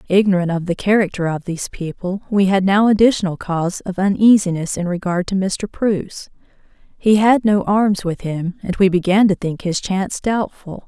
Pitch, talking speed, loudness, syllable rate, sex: 190 Hz, 180 wpm, -17 LUFS, 5.1 syllables/s, female